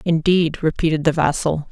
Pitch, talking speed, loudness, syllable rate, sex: 160 Hz, 140 wpm, -18 LUFS, 5.0 syllables/s, female